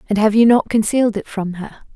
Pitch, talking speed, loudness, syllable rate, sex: 215 Hz, 245 wpm, -16 LUFS, 6.5 syllables/s, female